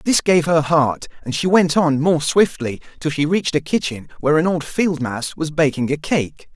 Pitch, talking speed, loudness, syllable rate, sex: 155 Hz, 220 wpm, -18 LUFS, 5.1 syllables/s, male